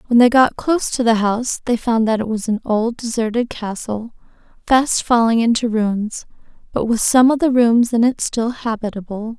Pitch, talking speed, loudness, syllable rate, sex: 230 Hz, 190 wpm, -17 LUFS, 4.9 syllables/s, female